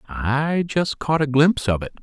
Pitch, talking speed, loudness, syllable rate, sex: 145 Hz, 210 wpm, -20 LUFS, 4.6 syllables/s, male